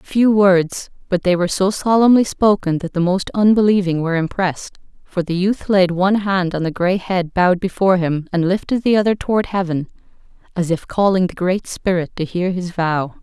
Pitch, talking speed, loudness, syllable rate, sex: 185 Hz, 195 wpm, -17 LUFS, 5.3 syllables/s, female